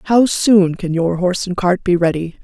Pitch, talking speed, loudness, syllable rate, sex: 180 Hz, 220 wpm, -15 LUFS, 5.0 syllables/s, female